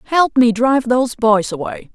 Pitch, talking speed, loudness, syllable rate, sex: 240 Hz, 185 wpm, -15 LUFS, 5.3 syllables/s, female